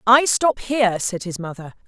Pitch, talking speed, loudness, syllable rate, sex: 210 Hz, 190 wpm, -19 LUFS, 4.8 syllables/s, female